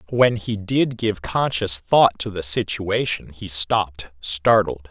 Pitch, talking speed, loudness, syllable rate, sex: 100 Hz, 145 wpm, -21 LUFS, 3.7 syllables/s, male